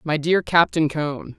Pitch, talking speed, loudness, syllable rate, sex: 160 Hz, 175 wpm, -20 LUFS, 3.9 syllables/s, male